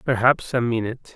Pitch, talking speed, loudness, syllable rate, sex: 120 Hz, 155 wpm, -22 LUFS, 5.7 syllables/s, male